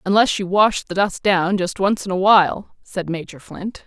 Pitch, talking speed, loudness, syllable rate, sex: 190 Hz, 215 wpm, -18 LUFS, 4.6 syllables/s, female